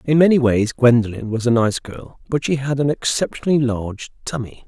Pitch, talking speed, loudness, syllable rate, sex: 125 Hz, 190 wpm, -18 LUFS, 5.5 syllables/s, male